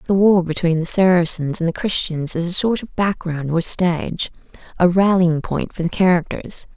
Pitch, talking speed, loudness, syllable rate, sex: 175 Hz, 185 wpm, -18 LUFS, 4.9 syllables/s, female